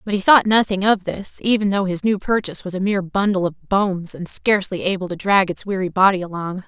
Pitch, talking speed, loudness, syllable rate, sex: 190 Hz, 235 wpm, -19 LUFS, 6.0 syllables/s, female